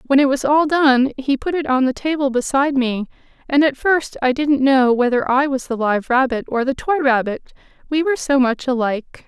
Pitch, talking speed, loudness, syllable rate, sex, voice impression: 265 Hz, 225 wpm, -17 LUFS, 5.5 syllables/s, female, feminine, adult-like, slightly relaxed, slightly bright, soft, muffled, intellectual, friendly, elegant, kind